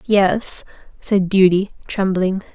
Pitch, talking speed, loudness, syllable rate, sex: 195 Hz, 95 wpm, -18 LUFS, 3.2 syllables/s, female